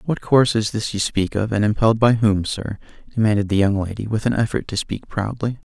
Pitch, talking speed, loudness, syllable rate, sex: 110 Hz, 230 wpm, -20 LUFS, 5.9 syllables/s, male